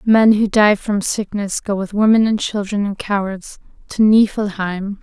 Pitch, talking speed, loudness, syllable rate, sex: 205 Hz, 165 wpm, -16 LUFS, 4.1 syllables/s, female